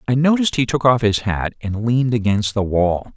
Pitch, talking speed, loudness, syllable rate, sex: 115 Hz, 230 wpm, -18 LUFS, 5.5 syllables/s, male